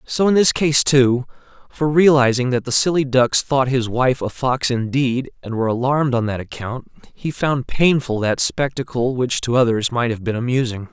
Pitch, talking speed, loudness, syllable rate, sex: 130 Hz, 190 wpm, -18 LUFS, 4.9 syllables/s, male